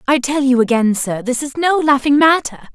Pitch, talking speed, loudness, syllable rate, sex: 270 Hz, 220 wpm, -15 LUFS, 5.4 syllables/s, female